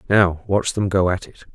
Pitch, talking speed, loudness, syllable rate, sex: 95 Hz, 235 wpm, -20 LUFS, 4.7 syllables/s, male